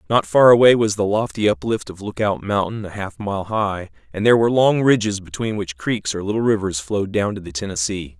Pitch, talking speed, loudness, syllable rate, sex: 100 Hz, 220 wpm, -19 LUFS, 5.7 syllables/s, male